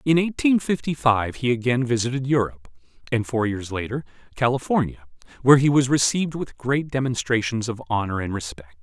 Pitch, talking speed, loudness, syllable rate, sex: 125 Hz, 165 wpm, -22 LUFS, 5.7 syllables/s, male